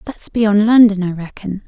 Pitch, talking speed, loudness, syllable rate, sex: 205 Hz, 180 wpm, -14 LUFS, 4.6 syllables/s, female